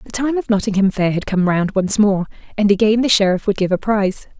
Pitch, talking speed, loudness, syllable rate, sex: 205 Hz, 245 wpm, -17 LUFS, 5.9 syllables/s, female